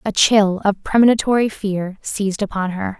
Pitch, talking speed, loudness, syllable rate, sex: 200 Hz, 160 wpm, -18 LUFS, 5.0 syllables/s, female